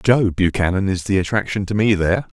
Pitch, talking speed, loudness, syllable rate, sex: 100 Hz, 200 wpm, -18 LUFS, 5.7 syllables/s, male